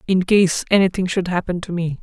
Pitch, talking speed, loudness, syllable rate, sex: 180 Hz, 205 wpm, -18 LUFS, 5.5 syllables/s, female